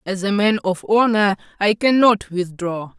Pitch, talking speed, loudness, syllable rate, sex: 200 Hz, 160 wpm, -18 LUFS, 4.3 syllables/s, female